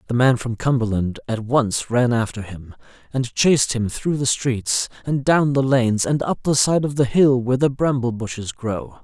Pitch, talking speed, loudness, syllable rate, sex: 125 Hz, 205 wpm, -20 LUFS, 4.7 syllables/s, male